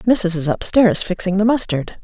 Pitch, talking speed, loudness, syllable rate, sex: 195 Hz, 175 wpm, -16 LUFS, 5.3 syllables/s, female